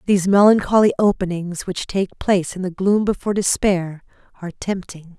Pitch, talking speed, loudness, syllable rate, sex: 190 Hz, 150 wpm, -19 LUFS, 5.5 syllables/s, female